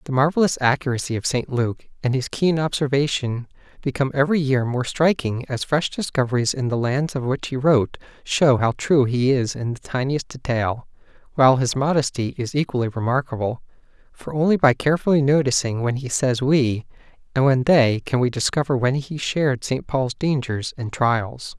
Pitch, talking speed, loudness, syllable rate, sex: 130 Hz, 175 wpm, -21 LUFS, 5.2 syllables/s, male